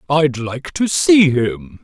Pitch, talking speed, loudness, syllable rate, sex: 140 Hz, 165 wpm, -15 LUFS, 3.1 syllables/s, male